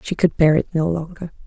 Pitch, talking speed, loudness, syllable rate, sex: 165 Hz, 245 wpm, -19 LUFS, 5.8 syllables/s, female